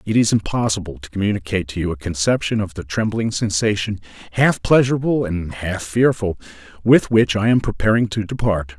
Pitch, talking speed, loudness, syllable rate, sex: 105 Hz, 170 wpm, -19 LUFS, 5.6 syllables/s, male